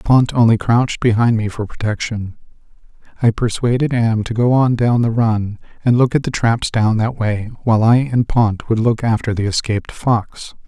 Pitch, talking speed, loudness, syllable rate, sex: 115 Hz, 190 wpm, -16 LUFS, 4.9 syllables/s, male